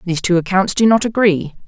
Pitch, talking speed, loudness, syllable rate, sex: 190 Hz, 215 wpm, -15 LUFS, 6.3 syllables/s, female